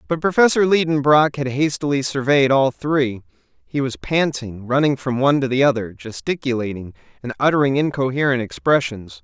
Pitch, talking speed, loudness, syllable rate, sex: 135 Hz, 145 wpm, -19 LUFS, 5.3 syllables/s, male